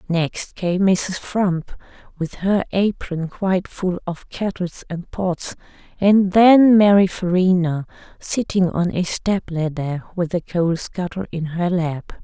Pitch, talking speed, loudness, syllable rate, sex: 180 Hz, 140 wpm, -19 LUFS, 3.6 syllables/s, female